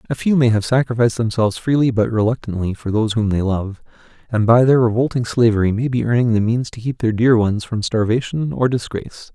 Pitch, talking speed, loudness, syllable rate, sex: 115 Hz, 210 wpm, -18 LUFS, 6.0 syllables/s, male